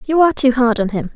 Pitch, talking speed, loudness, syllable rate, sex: 250 Hz, 310 wpm, -15 LUFS, 7.2 syllables/s, female